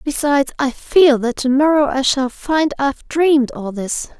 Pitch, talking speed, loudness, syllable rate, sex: 275 Hz, 170 wpm, -16 LUFS, 4.6 syllables/s, female